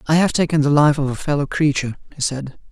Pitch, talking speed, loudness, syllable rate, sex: 145 Hz, 245 wpm, -18 LUFS, 6.5 syllables/s, male